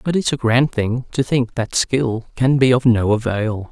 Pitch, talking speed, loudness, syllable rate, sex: 125 Hz, 225 wpm, -18 LUFS, 4.3 syllables/s, male